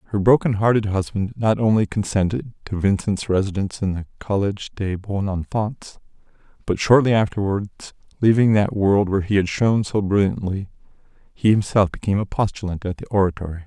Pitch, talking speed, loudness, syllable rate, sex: 100 Hz, 160 wpm, -20 LUFS, 5.7 syllables/s, male